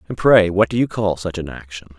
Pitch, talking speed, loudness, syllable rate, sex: 95 Hz, 270 wpm, -17 LUFS, 5.8 syllables/s, male